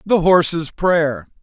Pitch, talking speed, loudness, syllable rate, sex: 170 Hz, 125 wpm, -16 LUFS, 3.3 syllables/s, male